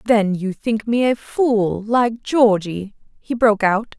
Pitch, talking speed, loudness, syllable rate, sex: 220 Hz, 165 wpm, -18 LUFS, 3.6 syllables/s, female